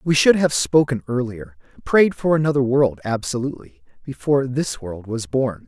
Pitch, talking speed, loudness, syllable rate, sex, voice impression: 130 Hz, 160 wpm, -20 LUFS, 4.9 syllables/s, male, masculine, middle-aged, tensed, powerful, bright, clear, cool, intellectual, calm, friendly, reassuring, wild, lively, kind